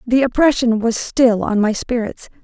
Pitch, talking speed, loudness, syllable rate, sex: 235 Hz, 170 wpm, -17 LUFS, 4.5 syllables/s, female